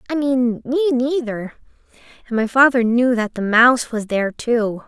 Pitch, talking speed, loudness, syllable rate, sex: 245 Hz, 170 wpm, -17 LUFS, 5.0 syllables/s, female